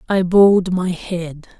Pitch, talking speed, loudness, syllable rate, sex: 180 Hz, 150 wpm, -16 LUFS, 3.8 syllables/s, female